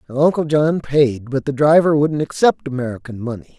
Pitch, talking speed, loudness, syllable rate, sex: 140 Hz, 170 wpm, -17 LUFS, 5.0 syllables/s, male